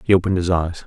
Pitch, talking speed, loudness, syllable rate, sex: 90 Hz, 280 wpm, -19 LUFS, 7.8 syllables/s, male